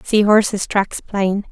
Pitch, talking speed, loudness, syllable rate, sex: 205 Hz, 160 wpm, -17 LUFS, 3.6 syllables/s, female